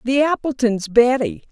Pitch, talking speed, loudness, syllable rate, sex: 250 Hz, 120 wpm, -18 LUFS, 4.6 syllables/s, female